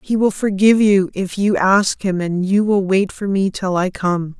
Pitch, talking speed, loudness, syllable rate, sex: 195 Hz, 230 wpm, -17 LUFS, 4.5 syllables/s, female